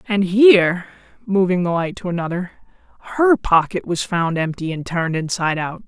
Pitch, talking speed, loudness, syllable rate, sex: 185 Hz, 165 wpm, -18 LUFS, 5.4 syllables/s, female